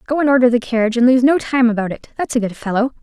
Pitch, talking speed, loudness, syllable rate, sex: 245 Hz, 295 wpm, -16 LUFS, 7.4 syllables/s, female